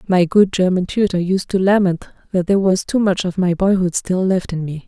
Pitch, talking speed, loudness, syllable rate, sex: 185 Hz, 235 wpm, -17 LUFS, 5.3 syllables/s, female